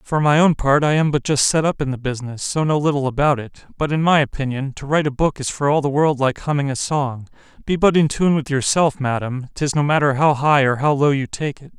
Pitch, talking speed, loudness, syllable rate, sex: 140 Hz, 260 wpm, -18 LUFS, 5.8 syllables/s, male